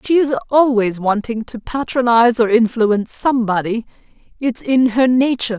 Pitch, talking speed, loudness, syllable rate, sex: 235 Hz, 140 wpm, -16 LUFS, 5.2 syllables/s, female